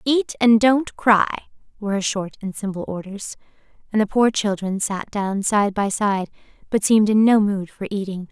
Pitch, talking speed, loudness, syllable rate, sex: 210 Hz, 190 wpm, -20 LUFS, 4.8 syllables/s, female